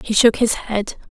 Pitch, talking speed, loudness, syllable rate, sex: 220 Hz, 215 wpm, -18 LUFS, 4.4 syllables/s, female